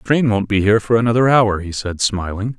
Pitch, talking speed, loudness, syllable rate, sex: 110 Hz, 255 wpm, -16 LUFS, 5.9 syllables/s, male